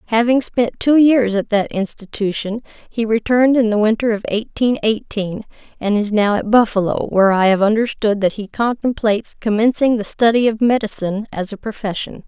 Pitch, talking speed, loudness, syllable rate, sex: 220 Hz, 170 wpm, -17 LUFS, 5.4 syllables/s, female